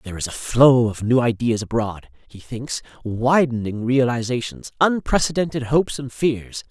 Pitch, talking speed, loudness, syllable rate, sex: 120 Hz, 145 wpm, -20 LUFS, 4.9 syllables/s, male